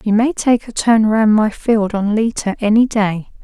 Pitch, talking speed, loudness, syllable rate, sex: 215 Hz, 210 wpm, -15 LUFS, 4.4 syllables/s, female